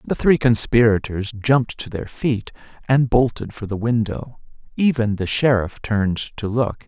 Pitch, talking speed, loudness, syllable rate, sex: 115 Hz, 155 wpm, -20 LUFS, 4.4 syllables/s, male